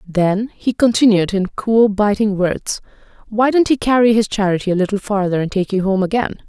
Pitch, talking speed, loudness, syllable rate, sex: 205 Hz, 195 wpm, -16 LUFS, 5.2 syllables/s, female